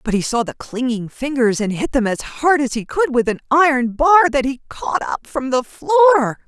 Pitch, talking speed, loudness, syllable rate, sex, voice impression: 270 Hz, 230 wpm, -17 LUFS, 4.9 syllables/s, female, feminine, very adult-like, slightly muffled, slightly fluent, slightly intellectual, slightly intense